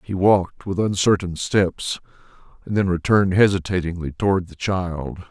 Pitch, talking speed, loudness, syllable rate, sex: 95 Hz, 135 wpm, -21 LUFS, 5.0 syllables/s, male